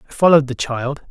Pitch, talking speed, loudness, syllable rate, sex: 140 Hz, 215 wpm, -17 LUFS, 6.4 syllables/s, male